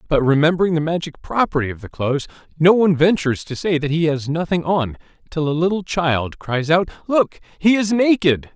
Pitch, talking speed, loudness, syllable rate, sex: 165 Hz, 195 wpm, -19 LUFS, 5.5 syllables/s, male